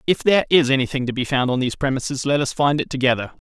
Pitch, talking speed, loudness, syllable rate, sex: 135 Hz, 260 wpm, -20 LUFS, 7.2 syllables/s, male